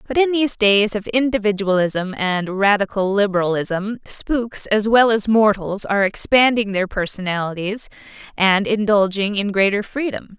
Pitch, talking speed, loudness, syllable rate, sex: 205 Hz, 135 wpm, -18 LUFS, 4.7 syllables/s, female